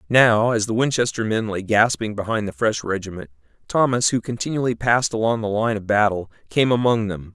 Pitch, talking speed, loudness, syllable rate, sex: 110 Hz, 190 wpm, -20 LUFS, 5.6 syllables/s, male